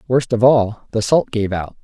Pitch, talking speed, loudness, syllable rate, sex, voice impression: 115 Hz, 230 wpm, -17 LUFS, 4.6 syllables/s, male, masculine, adult-like, thin, slightly muffled, fluent, cool, intellectual, calm, slightly friendly, reassuring, lively, slightly strict